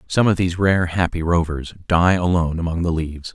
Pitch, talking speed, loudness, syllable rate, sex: 85 Hz, 195 wpm, -19 LUFS, 5.9 syllables/s, male